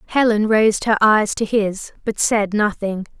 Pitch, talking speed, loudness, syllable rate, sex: 210 Hz, 170 wpm, -18 LUFS, 4.4 syllables/s, female